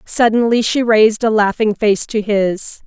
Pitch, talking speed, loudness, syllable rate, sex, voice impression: 215 Hz, 165 wpm, -14 LUFS, 4.4 syllables/s, female, feminine, middle-aged, tensed, powerful, clear, slightly fluent, intellectual, friendly, elegant, lively, slightly kind